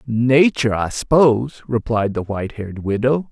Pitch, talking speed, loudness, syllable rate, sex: 120 Hz, 145 wpm, -18 LUFS, 4.8 syllables/s, male